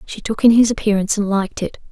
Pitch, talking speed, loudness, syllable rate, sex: 210 Hz, 250 wpm, -17 LUFS, 6.9 syllables/s, female